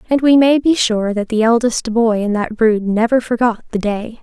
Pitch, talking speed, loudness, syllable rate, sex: 230 Hz, 225 wpm, -15 LUFS, 4.8 syllables/s, female